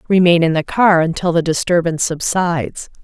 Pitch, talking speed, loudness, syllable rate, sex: 170 Hz, 160 wpm, -15 LUFS, 5.5 syllables/s, female